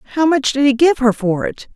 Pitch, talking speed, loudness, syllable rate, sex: 265 Hz, 275 wpm, -15 LUFS, 5.7 syllables/s, female